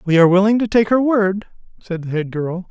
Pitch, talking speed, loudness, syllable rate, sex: 195 Hz, 245 wpm, -16 LUFS, 5.7 syllables/s, male